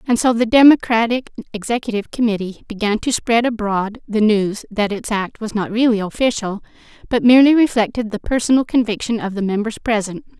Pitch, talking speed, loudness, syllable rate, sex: 225 Hz, 165 wpm, -17 LUFS, 5.7 syllables/s, female